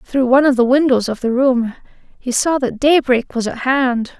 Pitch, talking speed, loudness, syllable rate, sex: 255 Hz, 215 wpm, -15 LUFS, 5.0 syllables/s, female